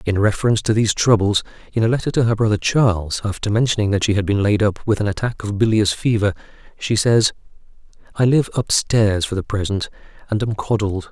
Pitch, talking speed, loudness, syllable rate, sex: 105 Hz, 205 wpm, -18 LUFS, 6.0 syllables/s, male